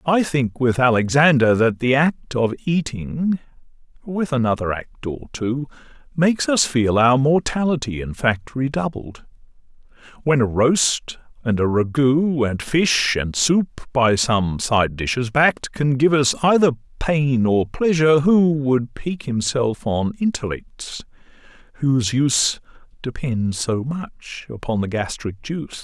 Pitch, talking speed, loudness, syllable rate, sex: 135 Hz, 135 wpm, -19 LUFS, 4.0 syllables/s, male